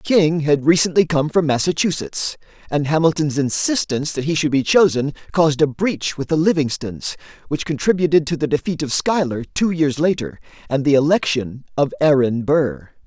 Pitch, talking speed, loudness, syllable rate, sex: 150 Hz, 165 wpm, -18 LUFS, 5.1 syllables/s, male